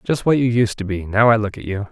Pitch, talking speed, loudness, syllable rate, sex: 110 Hz, 345 wpm, -18 LUFS, 6.1 syllables/s, male